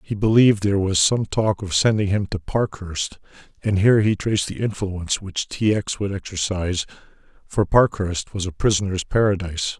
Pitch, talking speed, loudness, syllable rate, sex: 100 Hz, 170 wpm, -21 LUFS, 5.3 syllables/s, male